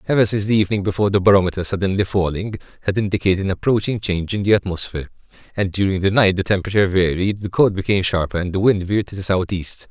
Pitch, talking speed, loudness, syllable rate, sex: 95 Hz, 210 wpm, -19 LUFS, 7.5 syllables/s, male